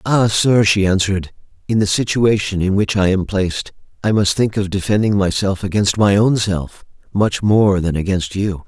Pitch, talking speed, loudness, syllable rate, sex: 100 Hz, 185 wpm, -16 LUFS, 4.8 syllables/s, male